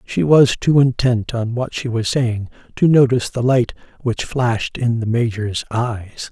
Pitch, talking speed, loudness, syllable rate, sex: 120 Hz, 180 wpm, -18 LUFS, 4.3 syllables/s, male